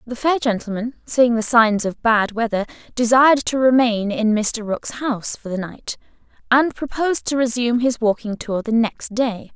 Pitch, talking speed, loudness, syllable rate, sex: 235 Hz, 180 wpm, -19 LUFS, 4.8 syllables/s, female